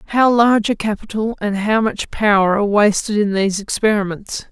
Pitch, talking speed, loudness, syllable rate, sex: 210 Hz, 175 wpm, -17 LUFS, 5.5 syllables/s, female